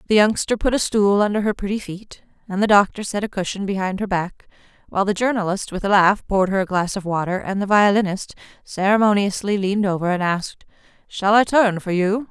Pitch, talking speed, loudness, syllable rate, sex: 200 Hz, 210 wpm, -19 LUFS, 5.8 syllables/s, female